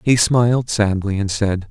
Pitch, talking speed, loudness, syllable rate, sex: 105 Hz, 175 wpm, -17 LUFS, 4.4 syllables/s, male